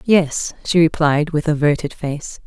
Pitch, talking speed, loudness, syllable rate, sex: 155 Hz, 145 wpm, -18 LUFS, 4.0 syllables/s, female